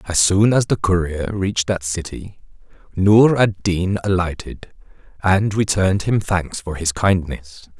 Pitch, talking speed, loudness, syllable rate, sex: 95 Hz, 145 wpm, -18 LUFS, 4.1 syllables/s, male